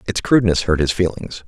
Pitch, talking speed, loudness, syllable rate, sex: 90 Hz, 205 wpm, -17 LUFS, 6.0 syllables/s, male